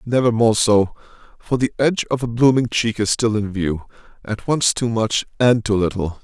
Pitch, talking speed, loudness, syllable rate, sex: 110 Hz, 195 wpm, -19 LUFS, 4.9 syllables/s, male